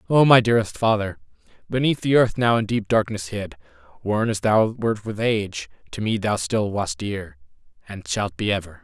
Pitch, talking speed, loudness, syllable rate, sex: 110 Hz, 190 wpm, -22 LUFS, 5.0 syllables/s, male